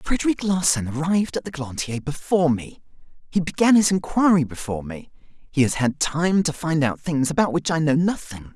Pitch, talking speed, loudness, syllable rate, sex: 155 Hz, 190 wpm, -22 LUFS, 5.3 syllables/s, male